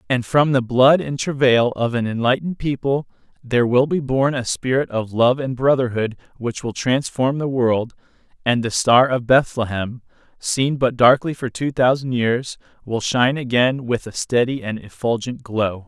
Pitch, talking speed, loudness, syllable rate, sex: 125 Hz, 175 wpm, -19 LUFS, 4.7 syllables/s, male